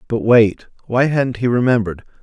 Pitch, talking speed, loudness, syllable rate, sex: 120 Hz, 135 wpm, -16 LUFS, 5.2 syllables/s, male